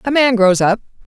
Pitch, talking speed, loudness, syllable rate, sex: 225 Hz, 200 wpm, -14 LUFS, 5.5 syllables/s, female